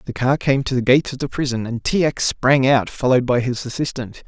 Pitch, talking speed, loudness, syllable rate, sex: 130 Hz, 255 wpm, -19 LUFS, 5.9 syllables/s, male